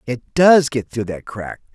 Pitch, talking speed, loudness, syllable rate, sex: 125 Hz, 205 wpm, -17 LUFS, 4.4 syllables/s, male